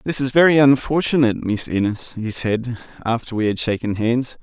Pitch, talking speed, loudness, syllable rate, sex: 120 Hz, 175 wpm, -19 LUFS, 5.3 syllables/s, male